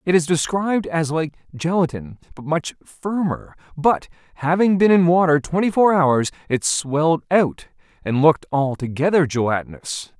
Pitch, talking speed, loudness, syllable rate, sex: 160 Hz, 140 wpm, -19 LUFS, 4.9 syllables/s, male